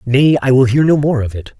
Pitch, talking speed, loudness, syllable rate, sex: 130 Hz, 300 wpm, -13 LUFS, 5.7 syllables/s, male